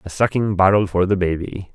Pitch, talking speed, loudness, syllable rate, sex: 95 Hz, 170 wpm, -18 LUFS, 5.5 syllables/s, male